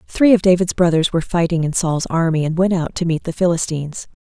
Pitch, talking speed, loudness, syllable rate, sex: 170 Hz, 225 wpm, -17 LUFS, 6.1 syllables/s, female